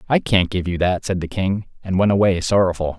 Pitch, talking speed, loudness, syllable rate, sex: 95 Hz, 240 wpm, -19 LUFS, 5.6 syllables/s, male